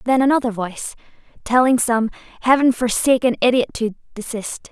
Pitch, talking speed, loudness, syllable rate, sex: 240 Hz, 125 wpm, -18 LUFS, 5.8 syllables/s, female